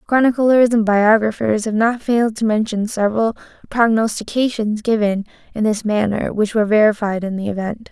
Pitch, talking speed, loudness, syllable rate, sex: 220 Hz, 150 wpm, -17 LUFS, 5.3 syllables/s, female